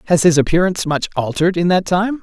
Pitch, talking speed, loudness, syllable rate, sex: 175 Hz, 215 wpm, -16 LUFS, 6.6 syllables/s, male